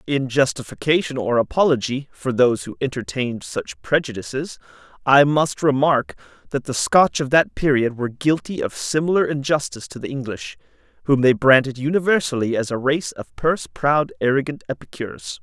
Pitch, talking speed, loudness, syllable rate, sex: 135 Hz, 150 wpm, -20 LUFS, 5.4 syllables/s, male